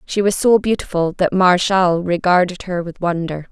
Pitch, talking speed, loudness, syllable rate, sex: 180 Hz, 170 wpm, -17 LUFS, 4.7 syllables/s, female